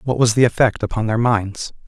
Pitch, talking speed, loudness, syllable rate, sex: 115 Hz, 225 wpm, -18 LUFS, 5.4 syllables/s, male